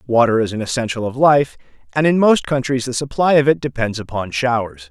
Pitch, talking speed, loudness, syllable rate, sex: 125 Hz, 210 wpm, -17 LUFS, 5.7 syllables/s, male